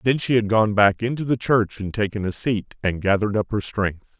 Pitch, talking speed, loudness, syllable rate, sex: 105 Hz, 245 wpm, -21 LUFS, 5.2 syllables/s, male